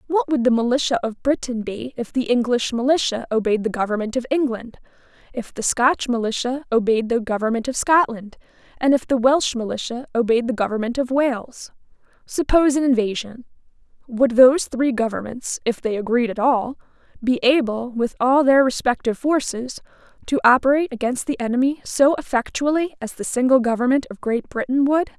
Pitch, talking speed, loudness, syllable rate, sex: 250 Hz, 165 wpm, -20 LUFS, 5.3 syllables/s, female